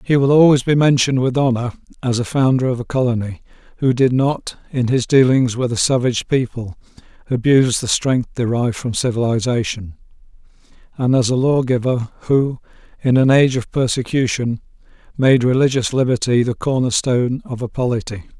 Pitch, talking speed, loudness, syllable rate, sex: 125 Hz, 155 wpm, -17 LUFS, 5.5 syllables/s, male